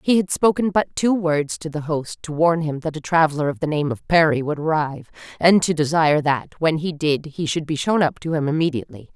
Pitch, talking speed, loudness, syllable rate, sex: 155 Hz, 245 wpm, -20 LUFS, 5.6 syllables/s, female